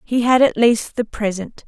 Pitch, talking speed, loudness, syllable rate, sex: 230 Hz, 215 wpm, -17 LUFS, 4.5 syllables/s, female